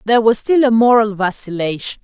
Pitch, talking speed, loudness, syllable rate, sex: 220 Hz, 175 wpm, -15 LUFS, 5.8 syllables/s, female